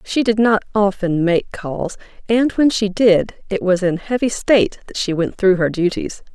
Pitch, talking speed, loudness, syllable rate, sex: 200 Hz, 200 wpm, -17 LUFS, 4.5 syllables/s, female